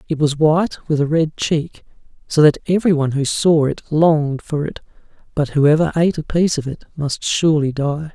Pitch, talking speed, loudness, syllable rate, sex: 155 Hz, 200 wpm, -17 LUFS, 5.5 syllables/s, male